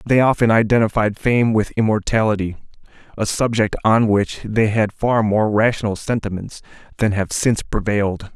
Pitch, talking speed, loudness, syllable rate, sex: 110 Hz, 145 wpm, -18 LUFS, 5.0 syllables/s, male